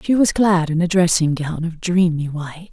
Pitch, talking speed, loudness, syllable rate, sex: 170 Hz, 220 wpm, -18 LUFS, 5.0 syllables/s, female